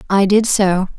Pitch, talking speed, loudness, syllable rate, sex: 195 Hz, 185 wpm, -14 LUFS, 4.1 syllables/s, female